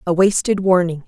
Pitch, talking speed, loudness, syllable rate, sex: 180 Hz, 165 wpm, -16 LUFS, 5.3 syllables/s, female